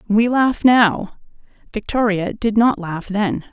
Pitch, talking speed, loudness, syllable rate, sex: 210 Hz, 135 wpm, -17 LUFS, 3.6 syllables/s, female